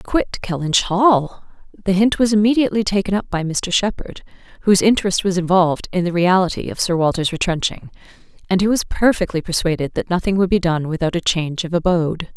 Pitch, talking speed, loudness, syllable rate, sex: 185 Hz, 185 wpm, -18 LUFS, 5.9 syllables/s, female